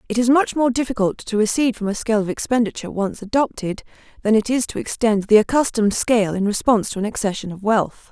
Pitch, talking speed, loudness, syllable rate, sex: 220 Hz, 215 wpm, -19 LUFS, 6.5 syllables/s, female